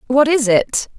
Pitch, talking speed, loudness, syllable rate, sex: 260 Hz, 180 wpm, -15 LUFS, 4.0 syllables/s, female